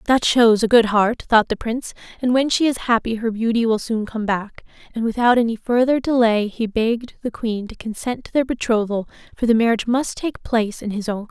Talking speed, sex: 230 wpm, female